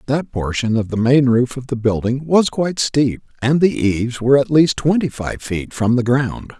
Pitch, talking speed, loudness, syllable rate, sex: 125 Hz, 220 wpm, -17 LUFS, 4.9 syllables/s, male